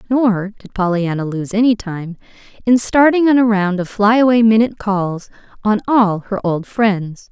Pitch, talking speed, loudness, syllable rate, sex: 210 Hz, 170 wpm, -15 LUFS, 4.6 syllables/s, female